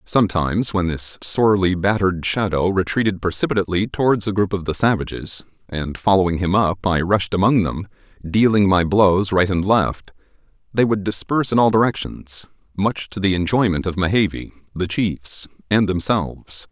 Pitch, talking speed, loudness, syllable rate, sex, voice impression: 95 Hz, 160 wpm, -19 LUFS, 5.2 syllables/s, male, masculine, middle-aged, thick, tensed, powerful, hard, slightly muffled, fluent, cool, intellectual, calm, mature, friendly, reassuring, wild, lively, slightly strict